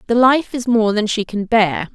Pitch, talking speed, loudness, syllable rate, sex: 225 Hz, 245 wpm, -16 LUFS, 4.6 syllables/s, female